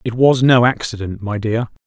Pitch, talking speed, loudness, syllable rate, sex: 115 Hz, 195 wpm, -16 LUFS, 4.9 syllables/s, male